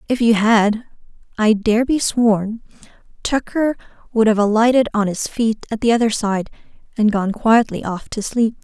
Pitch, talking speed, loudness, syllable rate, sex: 220 Hz, 165 wpm, -17 LUFS, 4.5 syllables/s, female